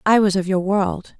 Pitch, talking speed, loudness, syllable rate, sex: 195 Hz, 250 wpm, -19 LUFS, 4.7 syllables/s, female